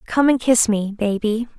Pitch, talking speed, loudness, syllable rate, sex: 225 Hz, 190 wpm, -18 LUFS, 4.4 syllables/s, female